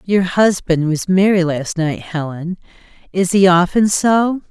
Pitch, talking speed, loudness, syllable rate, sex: 180 Hz, 145 wpm, -15 LUFS, 4.0 syllables/s, female